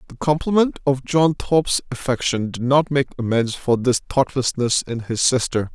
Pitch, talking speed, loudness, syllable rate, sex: 130 Hz, 165 wpm, -20 LUFS, 4.8 syllables/s, male